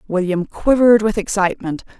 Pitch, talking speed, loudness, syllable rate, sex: 200 Hz, 120 wpm, -17 LUFS, 5.8 syllables/s, female